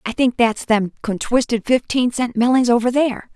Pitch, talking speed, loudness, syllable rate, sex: 240 Hz, 160 wpm, -18 LUFS, 5.1 syllables/s, female